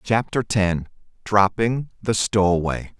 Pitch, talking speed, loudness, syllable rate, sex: 100 Hz, 80 wpm, -21 LUFS, 3.8 syllables/s, male